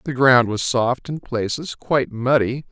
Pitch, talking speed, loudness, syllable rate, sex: 125 Hz, 175 wpm, -19 LUFS, 4.3 syllables/s, male